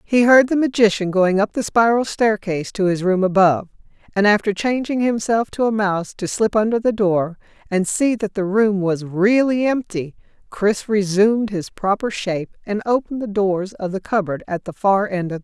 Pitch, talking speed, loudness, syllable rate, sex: 205 Hz, 200 wpm, -19 LUFS, 5.2 syllables/s, female